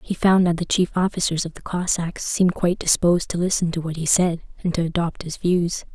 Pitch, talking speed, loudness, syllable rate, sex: 175 Hz, 230 wpm, -21 LUFS, 5.7 syllables/s, female